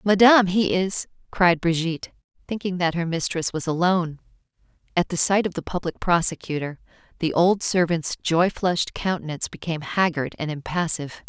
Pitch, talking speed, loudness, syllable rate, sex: 175 Hz, 150 wpm, -23 LUFS, 5.5 syllables/s, female